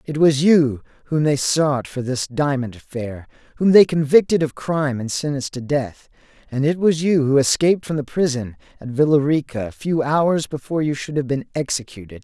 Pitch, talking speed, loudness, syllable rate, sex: 140 Hz, 195 wpm, -19 LUFS, 5.3 syllables/s, male